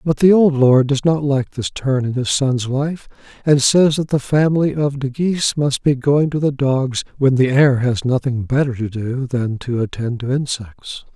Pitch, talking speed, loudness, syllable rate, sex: 135 Hz, 215 wpm, -17 LUFS, 4.5 syllables/s, male